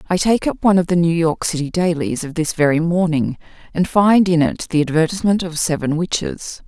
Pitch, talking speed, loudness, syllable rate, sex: 170 Hz, 205 wpm, -17 LUFS, 5.6 syllables/s, female